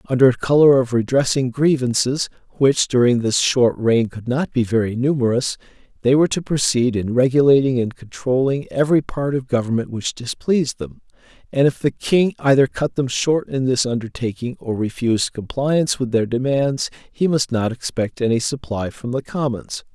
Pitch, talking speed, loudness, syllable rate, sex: 130 Hz, 170 wpm, -19 LUFS, 5.0 syllables/s, male